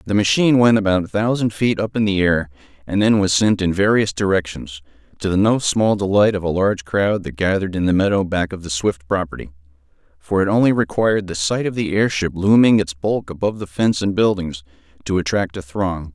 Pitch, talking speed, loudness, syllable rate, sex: 95 Hz, 215 wpm, -18 LUFS, 5.8 syllables/s, male